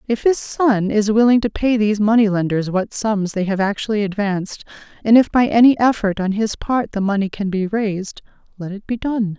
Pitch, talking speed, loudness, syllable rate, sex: 210 Hz, 210 wpm, -18 LUFS, 5.3 syllables/s, female